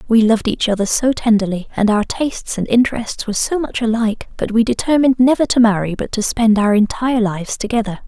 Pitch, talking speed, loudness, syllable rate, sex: 225 Hz, 210 wpm, -16 LUFS, 6.3 syllables/s, female